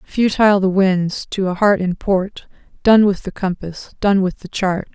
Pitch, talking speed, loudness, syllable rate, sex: 190 Hz, 195 wpm, -17 LUFS, 4.4 syllables/s, female